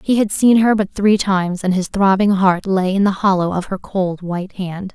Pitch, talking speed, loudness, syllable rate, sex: 195 Hz, 230 wpm, -16 LUFS, 5.0 syllables/s, female